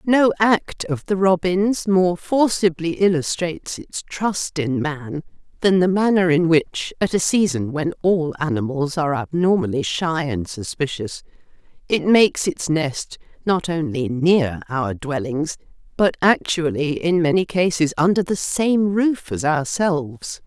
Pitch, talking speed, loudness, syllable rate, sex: 165 Hz, 140 wpm, -20 LUFS, 4.0 syllables/s, female